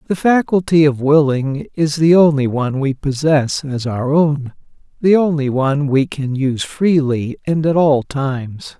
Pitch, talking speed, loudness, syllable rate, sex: 145 Hz, 165 wpm, -16 LUFS, 4.4 syllables/s, male